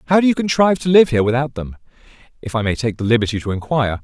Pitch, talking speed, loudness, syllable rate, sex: 135 Hz, 255 wpm, -17 LUFS, 7.8 syllables/s, male